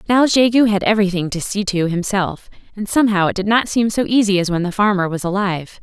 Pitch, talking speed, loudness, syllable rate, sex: 200 Hz, 225 wpm, -17 LUFS, 6.1 syllables/s, female